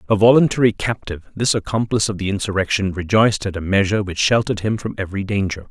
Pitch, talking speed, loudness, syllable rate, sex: 100 Hz, 190 wpm, -18 LUFS, 7.0 syllables/s, male